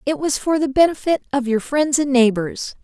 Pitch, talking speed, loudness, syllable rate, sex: 270 Hz, 210 wpm, -18 LUFS, 5.1 syllables/s, female